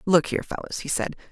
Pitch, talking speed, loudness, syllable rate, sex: 175 Hz, 230 wpm, -26 LUFS, 6.7 syllables/s, female